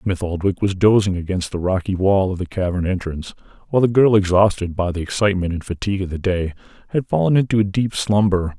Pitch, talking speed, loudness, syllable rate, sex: 95 Hz, 205 wpm, -19 LUFS, 6.0 syllables/s, male